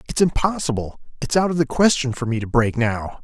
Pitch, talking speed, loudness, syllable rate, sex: 135 Hz, 225 wpm, -20 LUFS, 5.7 syllables/s, male